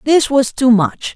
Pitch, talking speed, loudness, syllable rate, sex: 245 Hz, 205 wpm, -14 LUFS, 3.9 syllables/s, female